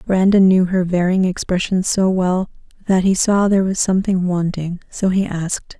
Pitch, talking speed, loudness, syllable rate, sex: 185 Hz, 175 wpm, -17 LUFS, 5.0 syllables/s, female